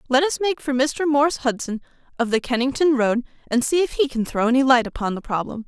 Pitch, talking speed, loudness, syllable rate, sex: 260 Hz, 235 wpm, -21 LUFS, 6.0 syllables/s, female